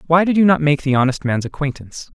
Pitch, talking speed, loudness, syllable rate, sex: 150 Hz, 245 wpm, -17 LUFS, 6.5 syllables/s, male